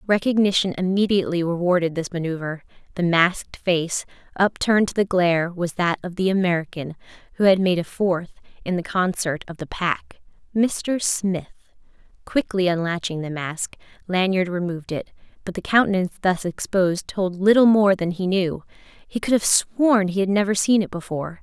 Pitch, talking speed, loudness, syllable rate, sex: 185 Hz, 160 wpm, -21 LUFS, 5.3 syllables/s, female